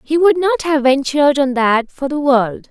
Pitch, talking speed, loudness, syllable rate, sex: 285 Hz, 220 wpm, -15 LUFS, 4.6 syllables/s, female